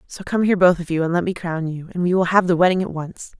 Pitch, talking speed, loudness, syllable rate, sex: 175 Hz, 335 wpm, -19 LUFS, 6.6 syllables/s, female